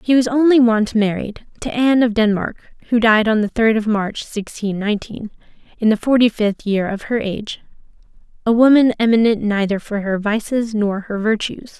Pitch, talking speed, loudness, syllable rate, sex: 220 Hz, 185 wpm, -17 LUFS, 5.1 syllables/s, female